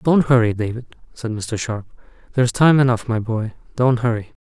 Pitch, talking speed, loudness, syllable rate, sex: 120 Hz, 175 wpm, -19 LUFS, 5.5 syllables/s, male